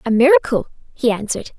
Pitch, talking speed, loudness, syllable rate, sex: 250 Hz, 150 wpm, -17 LUFS, 6.5 syllables/s, female